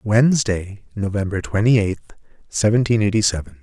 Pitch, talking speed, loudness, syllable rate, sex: 105 Hz, 115 wpm, -19 LUFS, 5.0 syllables/s, male